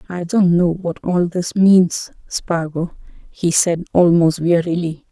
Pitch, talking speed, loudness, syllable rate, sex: 175 Hz, 140 wpm, -17 LUFS, 3.7 syllables/s, female